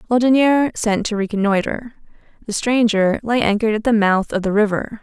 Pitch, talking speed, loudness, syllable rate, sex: 220 Hz, 165 wpm, -17 LUFS, 5.6 syllables/s, female